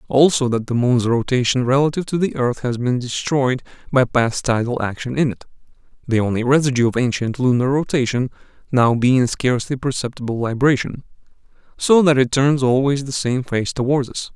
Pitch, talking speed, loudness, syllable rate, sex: 130 Hz, 170 wpm, -18 LUFS, 4.1 syllables/s, male